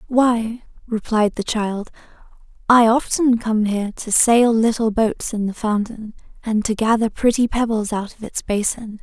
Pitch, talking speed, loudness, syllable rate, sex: 220 Hz, 160 wpm, -19 LUFS, 4.4 syllables/s, female